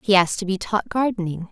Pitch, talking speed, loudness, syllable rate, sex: 195 Hz, 240 wpm, -22 LUFS, 6.4 syllables/s, female